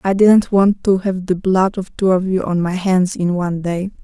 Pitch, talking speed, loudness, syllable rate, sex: 185 Hz, 255 wpm, -16 LUFS, 4.7 syllables/s, female